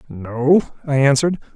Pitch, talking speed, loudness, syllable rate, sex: 140 Hz, 115 wpm, -17 LUFS, 5.3 syllables/s, male